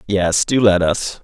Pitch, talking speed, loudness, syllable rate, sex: 100 Hz, 195 wpm, -16 LUFS, 3.7 syllables/s, male